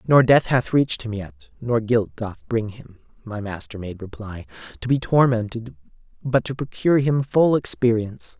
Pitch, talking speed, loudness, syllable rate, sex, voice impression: 120 Hz, 170 wpm, -21 LUFS, 4.9 syllables/s, male, masculine, adult-like, tensed, slightly powerful, clear, fluent, intellectual, refreshing, slightly sincere, friendly, lively, slightly kind